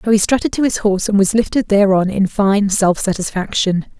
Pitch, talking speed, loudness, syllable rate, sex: 205 Hz, 210 wpm, -15 LUFS, 5.5 syllables/s, female